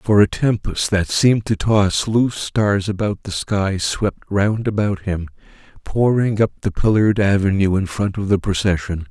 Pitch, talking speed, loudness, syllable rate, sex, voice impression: 100 Hz, 170 wpm, -18 LUFS, 4.6 syllables/s, male, very masculine, very adult-like, middle-aged, very thick, relaxed, weak, dark, soft, muffled, slightly halting, cool, very intellectual, sincere, calm, very mature, friendly, reassuring, unique, elegant, slightly sweet, kind, modest